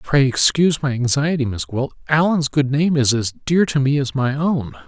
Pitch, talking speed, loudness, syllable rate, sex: 140 Hz, 210 wpm, -18 LUFS, 4.9 syllables/s, male